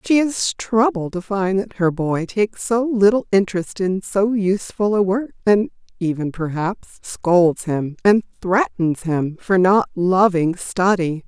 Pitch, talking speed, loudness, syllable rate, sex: 195 Hz, 155 wpm, -19 LUFS, 4.0 syllables/s, female